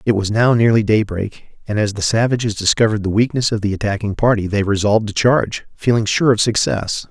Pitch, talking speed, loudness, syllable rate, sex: 110 Hz, 205 wpm, -17 LUFS, 6.0 syllables/s, male